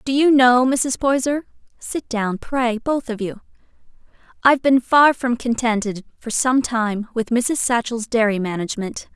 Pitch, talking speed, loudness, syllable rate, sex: 240 Hz, 145 wpm, -19 LUFS, 4.4 syllables/s, female